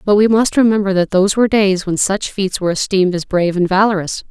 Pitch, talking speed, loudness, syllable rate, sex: 195 Hz, 235 wpm, -15 LUFS, 6.5 syllables/s, female